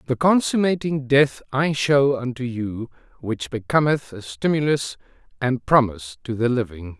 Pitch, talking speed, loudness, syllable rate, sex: 125 Hz, 135 wpm, -21 LUFS, 4.6 syllables/s, male